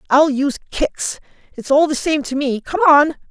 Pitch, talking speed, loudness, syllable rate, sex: 280 Hz, 200 wpm, -17 LUFS, 4.7 syllables/s, female